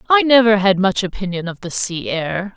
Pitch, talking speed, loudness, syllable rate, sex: 200 Hz, 210 wpm, -17 LUFS, 5.2 syllables/s, female